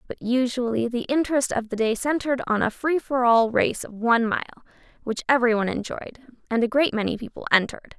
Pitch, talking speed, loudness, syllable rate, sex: 245 Hz, 195 wpm, -23 LUFS, 5.9 syllables/s, female